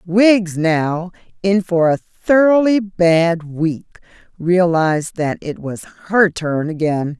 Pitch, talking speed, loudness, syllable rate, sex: 175 Hz, 125 wpm, -16 LUFS, 3.2 syllables/s, female